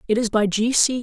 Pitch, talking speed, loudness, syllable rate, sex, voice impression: 225 Hz, 290 wpm, -19 LUFS, 5.4 syllables/s, female, feminine, slightly young, adult-like, thin, slightly tensed, slightly powerful, slightly dark, very hard, very clear, fluent, slightly cute, cool, intellectual, slightly refreshing, very sincere, very calm, slightly friendly, slightly reassuring, elegant, slightly wild, slightly sweet, slightly strict, slightly sharp